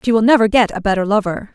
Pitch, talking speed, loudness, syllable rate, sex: 215 Hz, 270 wpm, -15 LUFS, 6.9 syllables/s, female